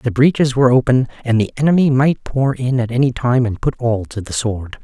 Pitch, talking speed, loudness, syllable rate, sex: 125 Hz, 235 wpm, -16 LUFS, 5.5 syllables/s, male